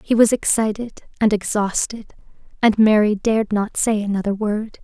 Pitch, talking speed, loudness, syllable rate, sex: 210 Hz, 150 wpm, -19 LUFS, 4.8 syllables/s, female